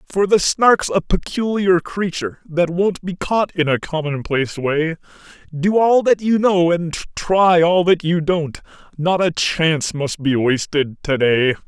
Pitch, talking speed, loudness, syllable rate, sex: 170 Hz, 170 wpm, -18 LUFS, 4.1 syllables/s, male